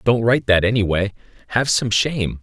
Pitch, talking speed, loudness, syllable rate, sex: 110 Hz, 175 wpm, -18 LUFS, 5.8 syllables/s, male